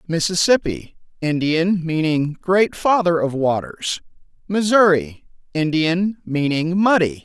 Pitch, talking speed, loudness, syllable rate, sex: 170 Hz, 75 wpm, -19 LUFS, 3.8 syllables/s, male